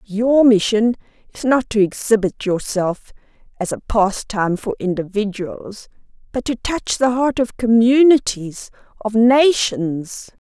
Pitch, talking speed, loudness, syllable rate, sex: 220 Hz, 120 wpm, -17 LUFS, 3.9 syllables/s, female